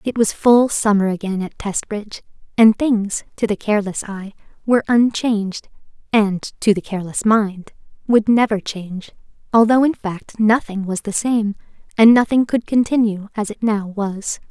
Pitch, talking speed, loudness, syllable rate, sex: 215 Hz, 155 wpm, -18 LUFS, 4.7 syllables/s, female